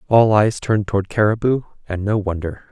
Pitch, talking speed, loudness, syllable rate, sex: 105 Hz, 175 wpm, -18 LUFS, 5.7 syllables/s, male